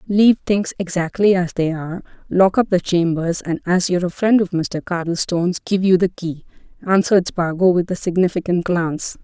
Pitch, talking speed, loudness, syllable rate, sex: 180 Hz, 180 wpm, -18 LUFS, 5.4 syllables/s, female